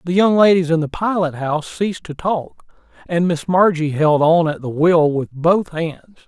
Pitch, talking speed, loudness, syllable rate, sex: 165 Hz, 200 wpm, -17 LUFS, 4.7 syllables/s, male